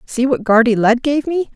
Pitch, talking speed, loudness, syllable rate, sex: 250 Hz, 230 wpm, -15 LUFS, 4.9 syllables/s, female